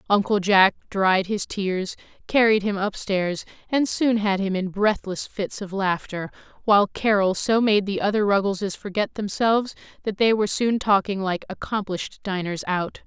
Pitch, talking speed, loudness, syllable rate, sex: 200 Hz, 160 wpm, -23 LUFS, 4.8 syllables/s, female